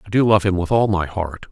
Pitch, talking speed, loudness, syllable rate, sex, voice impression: 95 Hz, 315 wpm, -18 LUFS, 6.0 syllables/s, male, very masculine, very middle-aged, very thick, tensed, powerful, slightly bright, very soft, very muffled, slightly halting, raspy, very cool, very intellectual, slightly refreshing, sincere, very calm, very mature, friendly, reassuring, unique, very elegant, very wild, sweet, lively, very kind, slightly intense